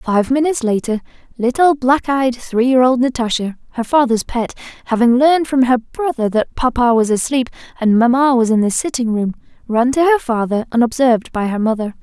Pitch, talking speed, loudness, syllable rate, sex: 245 Hz, 185 wpm, -16 LUFS, 5.4 syllables/s, female